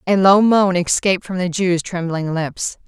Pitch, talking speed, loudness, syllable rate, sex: 180 Hz, 190 wpm, -17 LUFS, 4.5 syllables/s, female